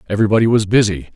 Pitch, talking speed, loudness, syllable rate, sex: 105 Hz, 155 wpm, -15 LUFS, 9.0 syllables/s, male